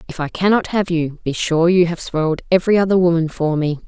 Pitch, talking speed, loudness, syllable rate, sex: 170 Hz, 230 wpm, -17 LUFS, 6.0 syllables/s, female